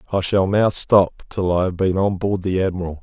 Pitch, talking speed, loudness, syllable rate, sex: 95 Hz, 240 wpm, -19 LUFS, 5.1 syllables/s, male